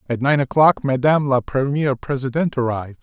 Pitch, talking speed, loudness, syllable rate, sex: 135 Hz, 160 wpm, -19 LUFS, 6.3 syllables/s, male